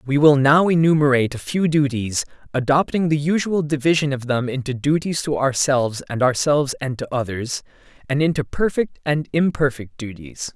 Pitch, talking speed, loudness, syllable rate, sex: 140 Hz, 160 wpm, -20 LUFS, 5.3 syllables/s, male